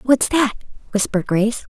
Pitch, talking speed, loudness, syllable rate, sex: 230 Hz, 140 wpm, -19 LUFS, 5.7 syllables/s, female